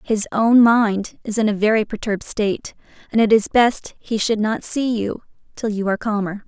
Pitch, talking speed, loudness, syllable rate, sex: 215 Hz, 205 wpm, -19 LUFS, 5.0 syllables/s, female